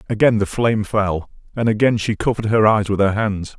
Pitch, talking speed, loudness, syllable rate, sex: 105 Hz, 220 wpm, -18 LUFS, 5.7 syllables/s, male